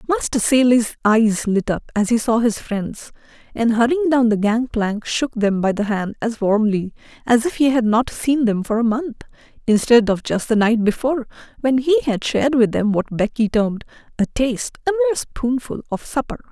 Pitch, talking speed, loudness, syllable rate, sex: 235 Hz, 195 wpm, -19 LUFS, 5.1 syllables/s, female